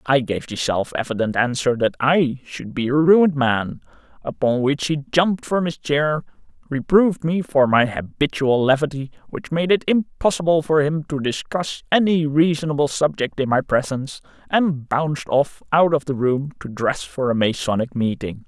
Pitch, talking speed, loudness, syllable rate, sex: 145 Hz, 170 wpm, -20 LUFS, 4.9 syllables/s, male